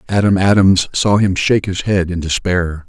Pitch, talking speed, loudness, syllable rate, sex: 95 Hz, 190 wpm, -14 LUFS, 4.9 syllables/s, male